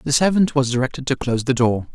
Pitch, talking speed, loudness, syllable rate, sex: 135 Hz, 245 wpm, -19 LUFS, 6.7 syllables/s, male